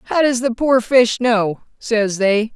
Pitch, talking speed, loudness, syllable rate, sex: 235 Hz, 190 wpm, -16 LUFS, 3.4 syllables/s, female